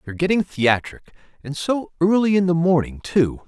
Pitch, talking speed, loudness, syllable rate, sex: 160 Hz, 155 wpm, -20 LUFS, 5.4 syllables/s, male